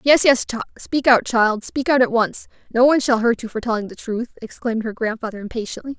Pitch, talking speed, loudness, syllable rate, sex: 235 Hz, 220 wpm, -19 LUFS, 5.9 syllables/s, female